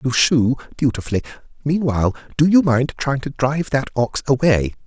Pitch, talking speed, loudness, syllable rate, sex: 135 Hz, 160 wpm, -19 LUFS, 5.4 syllables/s, male